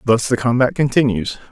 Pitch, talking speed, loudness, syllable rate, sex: 120 Hz, 160 wpm, -17 LUFS, 5.6 syllables/s, male